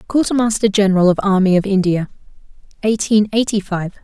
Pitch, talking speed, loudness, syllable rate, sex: 200 Hz, 135 wpm, -16 LUFS, 6.0 syllables/s, female